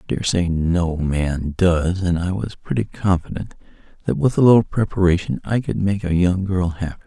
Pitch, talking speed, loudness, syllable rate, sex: 90 Hz, 195 wpm, -20 LUFS, 4.9 syllables/s, male